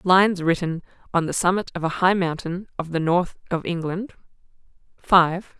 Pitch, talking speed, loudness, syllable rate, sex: 175 Hz, 160 wpm, -22 LUFS, 4.8 syllables/s, female